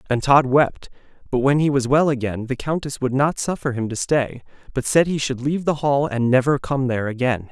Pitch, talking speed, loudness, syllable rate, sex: 135 Hz, 230 wpm, -20 LUFS, 5.5 syllables/s, male